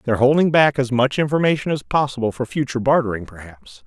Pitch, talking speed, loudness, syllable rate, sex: 130 Hz, 185 wpm, -19 LUFS, 6.4 syllables/s, male